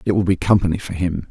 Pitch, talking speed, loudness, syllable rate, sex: 90 Hz, 275 wpm, -19 LUFS, 6.7 syllables/s, male